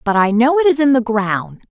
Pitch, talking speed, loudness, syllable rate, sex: 240 Hz, 280 wpm, -15 LUFS, 5.1 syllables/s, female